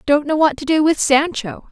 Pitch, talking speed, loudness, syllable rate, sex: 290 Hz, 245 wpm, -16 LUFS, 5.0 syllables/s, female